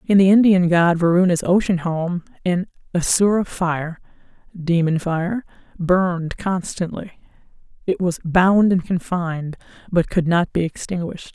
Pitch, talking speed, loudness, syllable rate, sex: 175 Hz, 125 wpm, -19 LUFS, 4.5 syllables/s, female